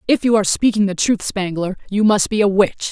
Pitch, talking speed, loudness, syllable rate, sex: 200 Hz, 245 wpm, -17 LUFS, 5.7 syllables/s, female